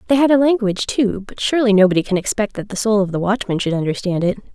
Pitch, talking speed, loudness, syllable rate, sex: 210 Hz, 250 wpm, -17 LUFS, 7.0 syllables/s, female